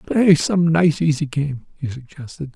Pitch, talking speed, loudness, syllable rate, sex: 150 Hz, 165 wpm, -18 LUFS, 4.3 syllables/s, male